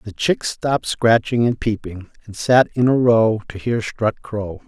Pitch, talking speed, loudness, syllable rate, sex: 110 Hz, 195 wpm, -19 LUFS, 4.3 syllables/s, male